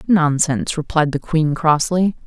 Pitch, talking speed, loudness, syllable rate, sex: 160 Hz, 135 wpm, -18 LUFS, 4.4 syllables/s, female